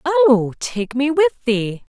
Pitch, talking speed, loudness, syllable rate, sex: 270 Hz, 150 wpm, -18 LUFS, 3.3 syllables/s, female